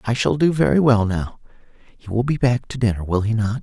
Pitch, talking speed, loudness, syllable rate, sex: 115 Hz, 250 wpm, -19 LUFS, 5.6 syllables/s, male